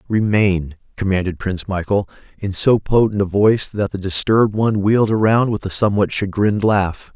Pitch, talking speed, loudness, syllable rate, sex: 100 Hz, 170 wpm, -17 LUFS, 5.6 syllables/s, male